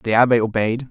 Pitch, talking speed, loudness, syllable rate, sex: 115 Hz, 200 wpm, -18 LUFS, 5.8 syllables/s, male